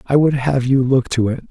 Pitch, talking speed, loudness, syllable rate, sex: 130 Hz, 280 wpm, -16 LUFS, 5.2 syllables/s, male